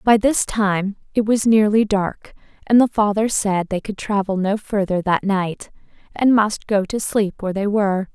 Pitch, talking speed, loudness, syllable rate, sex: 205 Hz, 190 wpm, -19 LUFS, 4.5 syllables/s, female